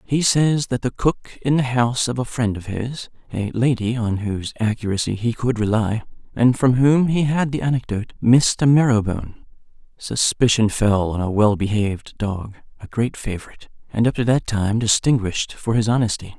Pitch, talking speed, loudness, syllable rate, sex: 115 Hz, 185 wpm, -20 LUFS, 5.1 syllables/s, male